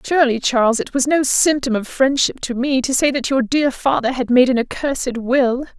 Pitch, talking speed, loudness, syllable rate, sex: 260 Hz, 220 wpm, -17 LUFS, 5.3 syllables/s, female